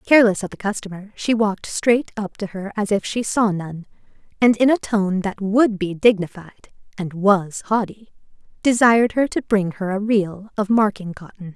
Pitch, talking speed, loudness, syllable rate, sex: 205 Hz, 185 wpm, -20 LUFS, 4.9 syllables/s, female